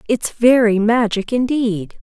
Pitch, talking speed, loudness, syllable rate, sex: 230 Hz, 115 wpm, -16 LUFS, 3.8 syllables/s, female